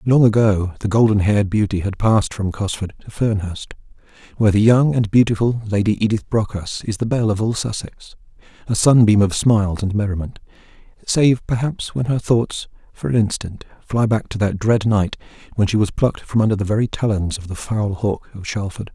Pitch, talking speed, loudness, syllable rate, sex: 105 Hz, 195 wpm, -18 LUFS, 5.4 syllables/s, male